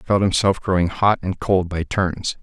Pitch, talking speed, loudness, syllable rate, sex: 95 Hz, 225 wpm, -20 LUFS, 4.8 syllables/s, male